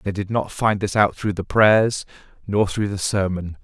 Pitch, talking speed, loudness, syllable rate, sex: 100 Hz, 215 wpm, -20 LUFS, 4.5 syllables/s, male